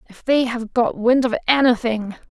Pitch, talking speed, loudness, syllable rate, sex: 240 Hz, 180 wpm, -19 LUFS, 4.7 syllables/s, female